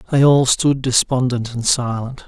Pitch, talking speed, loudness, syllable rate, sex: 125 Hz, 160 wpm, -17 LUFS, 4.4 syllables/s, male